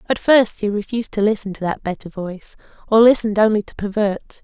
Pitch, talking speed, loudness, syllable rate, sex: 210 Hz, 205 wpm, -18 LUFS, 6.1 syllables/s, female